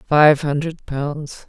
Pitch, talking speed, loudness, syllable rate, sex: 150 Hz, 120 wpm, -18 LUFS, 3.1 syllables/s, female